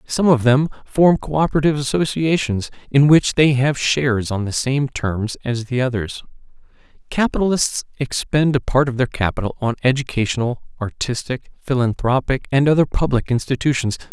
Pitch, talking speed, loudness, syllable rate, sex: 130 Hz, 140 wpm, -19 LUFS, 5.2 syllables/s, male